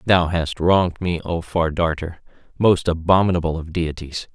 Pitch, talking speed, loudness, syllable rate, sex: 85 Hz, 150 wpm, -20 LUFS, 4.8 syllables/s, male